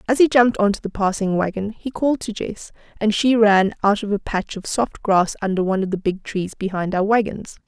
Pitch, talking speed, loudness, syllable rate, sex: 205 Hz, 240 wpm, -20 LUFS, 5.5 syllables/s, female